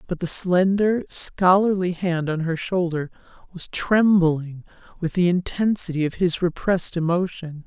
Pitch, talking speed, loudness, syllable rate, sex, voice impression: 175 Hz, 135 wpm, -21 LUFS, 4.4 syllables/s, female, feminine, adult-like, slightly thick, powerful, slightly hard, slightly muffled, raspy, friendly, reassuring, lively, kind, slightly modest